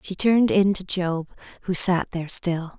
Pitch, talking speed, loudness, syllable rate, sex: 180 Hz, 195 wpm, -22 LUFS, 4.8 syllables/s, female